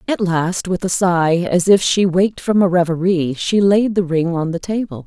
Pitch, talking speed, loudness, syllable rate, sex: 180 Hz, 225 wpm, -16 LUFS, 4.7 syllables/s, female